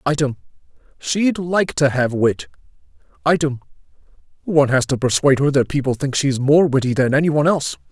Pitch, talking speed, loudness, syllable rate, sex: 135 Hz, 145 wpm, -18 LUFS, 5.7 syllables/s, male